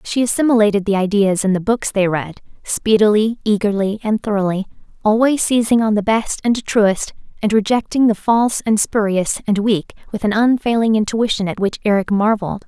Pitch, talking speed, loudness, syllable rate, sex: 210 Hz, 170 wpm, -17 LUFS, 5.3 syllables/s, female